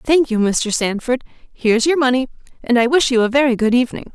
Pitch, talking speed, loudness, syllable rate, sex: 250 Hz, 230 wpm, -16 LUFS, 6.7 syllables/s, female